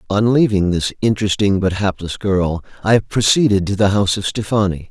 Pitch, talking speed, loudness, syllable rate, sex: 100 Hz, 170 wpm, -17 LUFS, 5.4 syllables/s, male